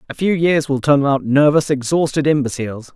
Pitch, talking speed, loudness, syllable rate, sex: 145 Hz, 205 wpm, -16 LUFS, 5.8 syllables/s, male